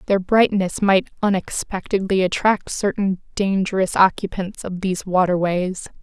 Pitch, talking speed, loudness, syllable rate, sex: 190 Hz, 110 wpm, -20 LUFS, 4.5 syllables/s, female